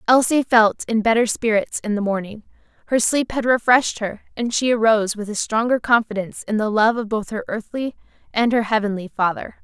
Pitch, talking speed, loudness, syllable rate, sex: 225 Hz, 195 wpm, -20 LUFS, 5.6 syllables/s, female